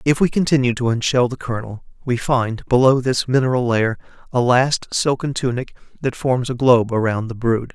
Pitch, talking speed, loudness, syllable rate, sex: 125 Hz, 185 wpm, -19 LUFS, 5.2 syllables/s, male